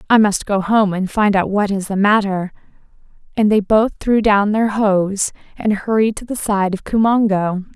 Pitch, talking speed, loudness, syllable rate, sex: 205 Hz, 195 wpm, -16 LUFS, 4.5 syllables/s, female